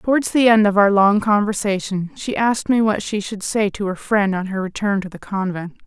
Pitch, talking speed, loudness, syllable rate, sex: 205 Hz, 235 wpm, -18 LUFS, 5.3 syllables/s, female